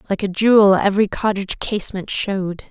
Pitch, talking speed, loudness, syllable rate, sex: 200 Hz, 155 wpm, -18 LUFS, 6.1 syllables/s, female